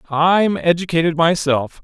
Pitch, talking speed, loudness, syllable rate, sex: 160 Hz, 100 wpm, -16 LUFS, 4.4 syllables/s, male